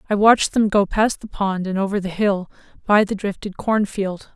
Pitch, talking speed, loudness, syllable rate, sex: 200 Hz, 205 wpm, -20 LUFS, 5.0 syllables/s, female